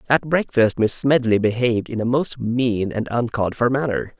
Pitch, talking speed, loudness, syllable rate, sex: 120 Hz, 185 wpm, -20 LUFS, 5.1 syllables/s, male